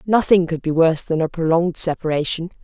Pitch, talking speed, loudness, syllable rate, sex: 165 Hz, 180 wpm, -19 LUFS, 6.2 syllables/s, female